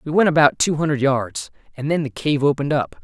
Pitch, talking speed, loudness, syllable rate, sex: 140 Hz, 235 wpm, -19 LUFS, 6.0 syllables/s, male